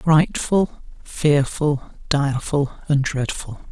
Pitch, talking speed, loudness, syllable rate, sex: 145 Hz, 80 wpm, -21 LUFS, 3.2 syllables/s, male